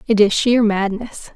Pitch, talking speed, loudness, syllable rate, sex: 215 Hz, 175 wpm, -16 LUFS, 4.2 syllables/s, female